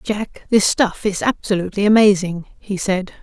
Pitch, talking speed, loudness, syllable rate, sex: 200 Hz, 150 wpm, -18 LUFS, 5.0 syllables/s, female